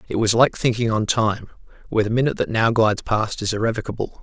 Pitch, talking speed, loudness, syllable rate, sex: 110 Hz, 215 wpm, -20 LUFS, 6.6 syllables/s, male